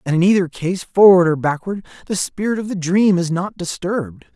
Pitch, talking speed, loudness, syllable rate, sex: 180 Hz, 205 wpm, -17 LUFS, 5.3 syllables/s, male